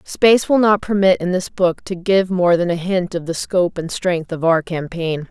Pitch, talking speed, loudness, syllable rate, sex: 180 Hz, 235 wpm, -17 LUFS, 4.8 syllables/s, female